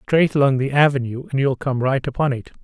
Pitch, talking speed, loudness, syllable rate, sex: 135 Hz, 230 wpm, -19 LUFS, 5.7 syllables/s, male